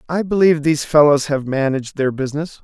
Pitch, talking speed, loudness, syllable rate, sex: 145 Hz, 180 wpm, -17 LUFS, 6.5 syllables/s, male